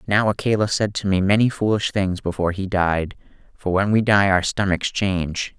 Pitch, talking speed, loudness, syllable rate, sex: 100 Hz, 195 wpm, -20 LUFS, 5.1 syllables/s, male